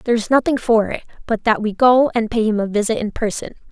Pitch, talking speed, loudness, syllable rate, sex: 225 Hz, 260 wpm, -17 LUFS, 6.2 syllables/s, female